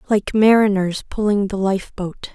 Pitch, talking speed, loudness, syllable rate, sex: 200 Hz, 155 wpm, -18 LUFS, 4.4 syllables/s, female